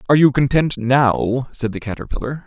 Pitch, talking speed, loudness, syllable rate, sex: 130 Hz, 170 wpm, -18 LUFS, 5.4 syllables/s, male